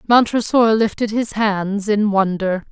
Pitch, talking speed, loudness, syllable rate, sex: 210 Hz, 130 wpm, -17 LUFS, 4.0 syllables/s, female